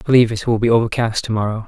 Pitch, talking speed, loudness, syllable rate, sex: 115 Hz, 285 wpm, -17 LUFS, 8.0 syllables/s, male